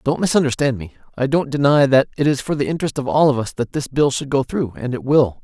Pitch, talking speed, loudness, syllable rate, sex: 135 Hz, 275 wpm, -18 LUFS, 6.2 syllables/s, male